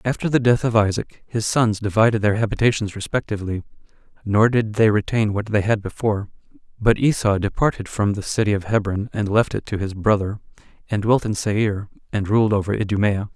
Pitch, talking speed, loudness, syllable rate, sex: 105 Hz, 185 wpm, -20 LUFS, 5.6 syllables/s, male